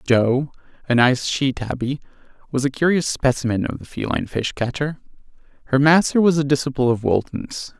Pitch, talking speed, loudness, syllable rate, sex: 135 Hz, 160 wpm, -20 LUFS, 5.3 syllables/s, male